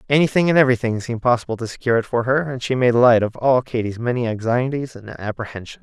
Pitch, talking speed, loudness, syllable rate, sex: 120 Hz, 215 wpm, -19 LUFS, 6.7 syllables/s, male